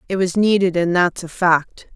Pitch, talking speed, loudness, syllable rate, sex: 180 Hz, 215 wpm, -17 LUFS, 4.7 syllables/s, female